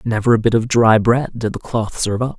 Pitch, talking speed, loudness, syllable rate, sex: 115 Hz, 300 wpm, -16 LUFS, 6.0 syllables/s, male